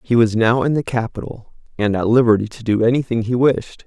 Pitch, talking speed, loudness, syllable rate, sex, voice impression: 115 Hz, 215 wpm, -17 LUFS, 5.7 syllables/s, male, masculine, adult-like, cool, slightly intellectual, calm, reassuring, slightly elegant